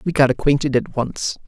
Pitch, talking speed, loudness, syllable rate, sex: 135 Hz, 205 wpm, -19 LUFS, 5.3 syllables/s, male